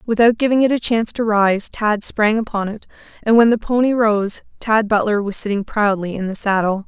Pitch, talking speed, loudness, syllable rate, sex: 215 Hz, 210 wpm, -17 LUFS, 5.3 syllables/s, female